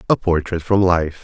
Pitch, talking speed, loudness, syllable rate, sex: 85 Hz, 195 wpm, -18 LUFS, 4.8 syllables/s, male